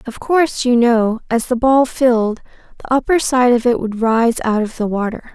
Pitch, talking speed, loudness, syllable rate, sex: 240 Hz, 215 wpm, -16 LUFS, 4.9 syllables/s, female